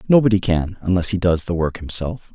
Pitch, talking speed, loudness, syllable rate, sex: 95 Hz, 180 wpm, -19 LUFS, 5.7 syllables/s, male